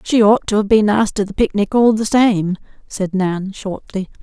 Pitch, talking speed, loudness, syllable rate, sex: 205 Hz, 215 wpm, -16 LUFS, 4.8 syllables/s, female